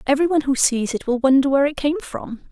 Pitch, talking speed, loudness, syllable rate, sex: 275 Hz, 265 wpm, -19 LUFS, 7.2 syllables/s, female